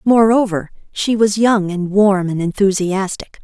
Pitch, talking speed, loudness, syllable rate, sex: 200 Hz, 140 wpm, -16 LUFS, 4.1 syllables/s, female